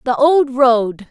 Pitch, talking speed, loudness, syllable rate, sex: 255 Hz, 165 wpm, -14 LUFS, 3.1 syllables/s, female